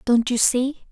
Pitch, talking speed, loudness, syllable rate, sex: 250 Hz, 195 wpm, -20 LUFS, 3.8 syllables/s, female